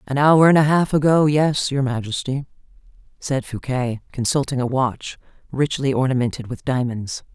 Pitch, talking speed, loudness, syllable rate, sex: 135 Hz, 145 wpm, -20 LUFS, 4.9 syllables/s, female